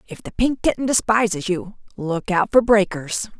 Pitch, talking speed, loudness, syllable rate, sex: 195 Hz, 175 wpm, -20 LUFS, 4.7 syllables/s, female